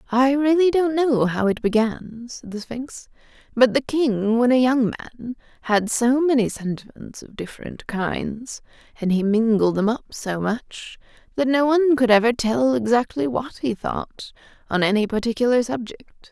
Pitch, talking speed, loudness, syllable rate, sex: 240 Hz, 165 wpm, -21 LUFS, 4.6 syllables/s, female